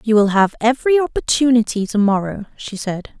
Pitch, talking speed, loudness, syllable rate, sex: 225 Hz, 170 wpm, -17 LUFS, 5.5 syllables/s, female